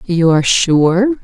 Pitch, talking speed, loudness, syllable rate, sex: 185 Hz, 145 wpm, -12 LUFS, 3.9 syllables/s, female